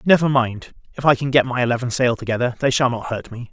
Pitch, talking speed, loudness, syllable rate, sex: 125 Hz, 255 wpm, -19 LUFS, 6.4 syllables/s, male